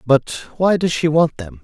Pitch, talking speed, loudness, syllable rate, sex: 150 Hz, 220 wpm, -17 LUFS, 4.5 syllables/s, male